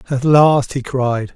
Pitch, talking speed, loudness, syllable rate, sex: 135 Hz, 175 wpm, -15 LUFS, 3.5 syllables/s, male